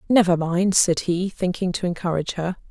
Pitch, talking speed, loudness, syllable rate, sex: 180 Hz, 175 wpm, -21 LUFS, 5.4 syllables/s, female